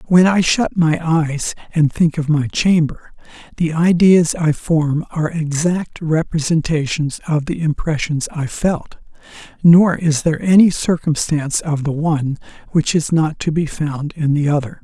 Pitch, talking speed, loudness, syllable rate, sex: 160 Hz, 160 wpm, -17 LUFS, 4.3 syllables/s, male